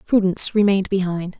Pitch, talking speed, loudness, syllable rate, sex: 190 Hz, 130 wpm, -18 LUFS, 6.4 syllables/s, female